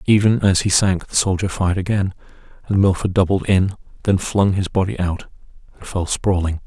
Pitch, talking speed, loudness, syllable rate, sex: 95 Hz, 180 wpm, -19 LUFS, 5.3 syllables/s, male